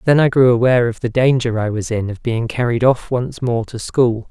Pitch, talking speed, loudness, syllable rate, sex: 120 Hz, 250 wpm, -17 LUFS, 5.3 syllables/s, male